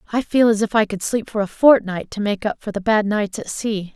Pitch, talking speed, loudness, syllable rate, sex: 210 Hz, 290 wpm, -19 LUFS, 5.5 syllables/s, female